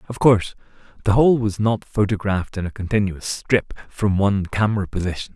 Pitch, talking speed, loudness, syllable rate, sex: 100 Hz, 170 wpm, -20 LUFS, 5.8 syllables/s, male